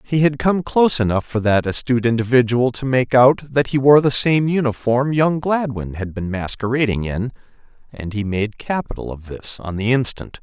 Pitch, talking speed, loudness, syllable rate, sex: 125 Hz, 190 wpm, -18 LUFS, 5.1 syllables/s, male